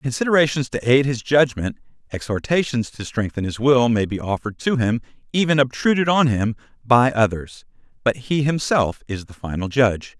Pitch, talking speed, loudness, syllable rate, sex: 125 Hz, 165 wpm, -20 LUFS, 5.3 syllables/s, male